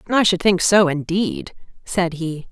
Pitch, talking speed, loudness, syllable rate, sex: 180 Hz, 165 wpm, -18 LUFS, 4.0 syllables/s, female